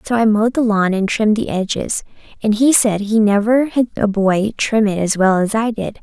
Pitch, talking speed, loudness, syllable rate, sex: 215 Hz, 240 wpm, -16 LUFS, 5.2 syllables/s, female